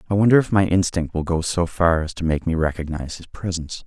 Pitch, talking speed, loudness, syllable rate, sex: 85 Hz, 250 wpm, -21 LUFS, 6.3 syllables/s, male